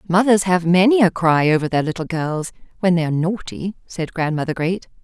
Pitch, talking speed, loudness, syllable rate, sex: 175 Hz, 190 wpm, -18 LUFS, 5.5 syllables/s, female